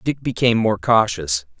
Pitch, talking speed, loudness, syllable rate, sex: 105 Hz, 150 wpm, -18 LUFS, 5.0 syllables/s, male